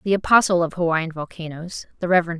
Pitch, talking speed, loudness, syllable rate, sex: 170 Hz, 175 wpm, -20 LUFS, 5.8 syllables/s, female